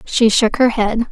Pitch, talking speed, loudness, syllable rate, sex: 230 Hz, 215 wpm, -15 LUFS, 4.2 syllables/s, female